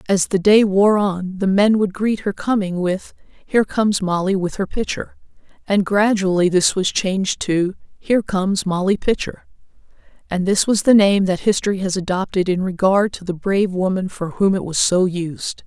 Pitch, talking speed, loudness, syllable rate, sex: 195 Hz, 190 wpm, -18 LUFS, 4.9 syllables/s, female